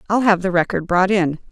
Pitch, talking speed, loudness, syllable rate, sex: 185 Hz, 235 wpm, -17 LUFS, 5.6 syllables/s, female